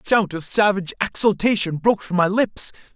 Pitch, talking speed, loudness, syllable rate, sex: 195 Hz, 185 wpm, -20 LUFS, 6.0 syllables/s, male